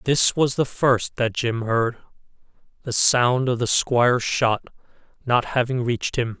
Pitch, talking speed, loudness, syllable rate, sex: 120 Hz, 160 wpm, -21 LUFS, 4.3 syllables/s, male